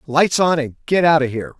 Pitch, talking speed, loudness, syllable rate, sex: 150 Hz, 265 wpm, -17 LUFS, 6.0 syllables/s, male